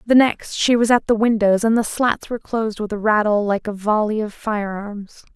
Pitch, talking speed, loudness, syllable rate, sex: 215 Hz, 225 wpm, -19 LUFS, 5.0 syllables/s, female